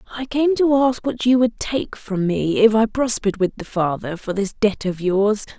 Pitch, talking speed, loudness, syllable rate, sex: 220 Hz, 225 wpm, -19 LUFS, 4.7 syllables/s, female